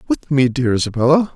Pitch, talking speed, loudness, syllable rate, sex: 135 Hz, 175 wpm, -16 LUFS, 5.9 syllables/s, male